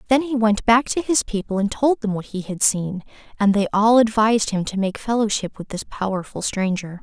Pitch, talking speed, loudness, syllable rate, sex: 210 Hz, 220 wpm, -20 LUFS, 5.3 syllables/s, female